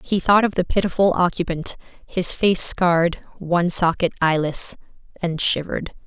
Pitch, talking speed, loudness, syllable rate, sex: 175 Hz, 120 wpm, -20 LUFS, 4.9 syllables/s, female